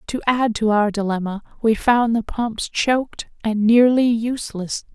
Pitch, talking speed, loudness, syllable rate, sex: 225 Hz, 160 wpm, -19 LUFS, 4.4 syllables/s, female